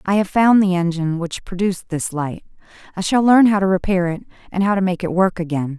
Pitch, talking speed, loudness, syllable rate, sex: 185 Hz, 240 wpm, -18 LUFS, 5.9 syllables/s, female